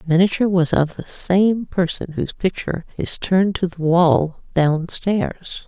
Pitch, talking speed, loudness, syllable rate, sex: 175 Hz, 170 wpm, -19 LUFS, 4.6 syllables/s, female